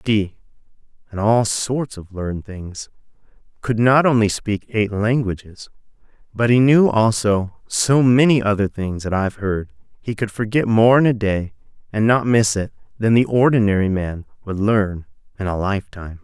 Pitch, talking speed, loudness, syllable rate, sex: 110 Hz, 160 wpm, -18 LUFS, 4.7 syllables/s, male